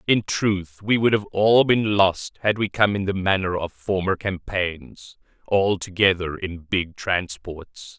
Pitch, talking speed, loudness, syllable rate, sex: 95 Hz, 165 wpm, -22 LUFS, 3.8 syllables/s, male